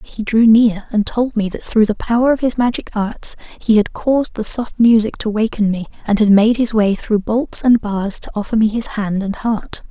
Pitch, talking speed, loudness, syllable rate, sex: 220 Hz, 235 wpm, -16 LUFS, 4.8 syllables/s, female